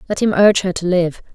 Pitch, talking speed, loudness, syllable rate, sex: 185 Hz, 265 wpm, -16 LUFS, 6.5 syllables/s, female